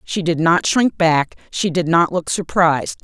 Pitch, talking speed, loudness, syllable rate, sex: 170 Hz, 200 wpm, -17 LUFS, 4.3 syllables/s, female